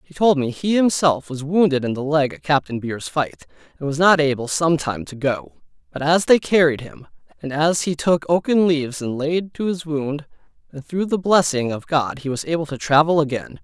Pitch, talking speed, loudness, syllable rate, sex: 150 Hz, 220 wpm, -20 LUFS, 5.1 syllables/s, male